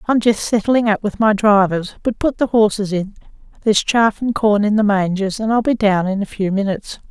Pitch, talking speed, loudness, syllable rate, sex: 210 Hz, 230 wpm, -17 LUFS, 5.4 syllables/s, female